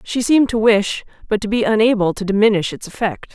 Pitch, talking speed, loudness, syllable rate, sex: 215 Hz, 215 wpm, -17 LUFS, 6.0 syllables/s, female